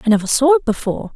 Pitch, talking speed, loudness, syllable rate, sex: 250 Hz, 260 wpm, -16 LUFS, 7.9 syllables/s, female